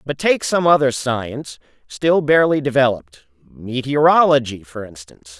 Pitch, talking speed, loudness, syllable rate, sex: 135 Hz, 120 wpm, -16 LUFS, 5.0 syllables/s, male